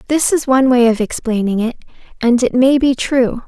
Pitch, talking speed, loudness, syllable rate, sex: 250 Hz, 205 wpm, -14 LUFS, 5.4 syllables/s, female